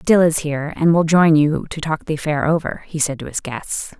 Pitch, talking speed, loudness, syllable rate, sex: 155 Hz, 255 wpm, -18 LUFS, 5.2 syllables/s, female